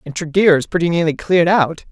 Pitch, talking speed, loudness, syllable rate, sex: 165 Hz, 220 wpm, -15 LUFS, 6.3 syllables/s, female